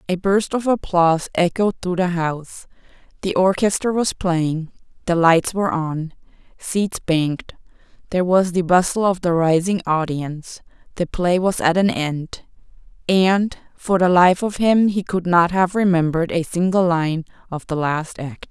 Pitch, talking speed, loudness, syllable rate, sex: 180 Hz, 160 wpm, -19 LUFS, 4.5 syllables/s, female